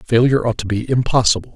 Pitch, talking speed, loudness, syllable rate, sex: 120 Hz, 195 wpm, -17 LUFS, 6.9 syllables/s, male